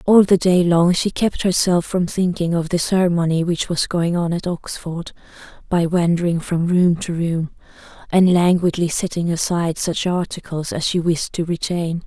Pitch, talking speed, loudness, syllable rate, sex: 175 Hz, 175 wpm, -19 LUFS, 4.7 syllables/s, female